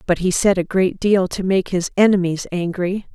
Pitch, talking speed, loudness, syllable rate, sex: 185 Hz, 210 wpm, -18 LUFS, 4.9 syllables/s, female